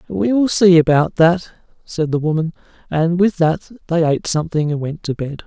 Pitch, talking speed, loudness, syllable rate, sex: 165 Hz, 200 wpm, -17 LUFS, 5.2 syllables/s, male